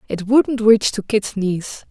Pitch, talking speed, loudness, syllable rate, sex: 215 Hz, 190 wpm, -17 LUFS, 3.5 syllables/s, female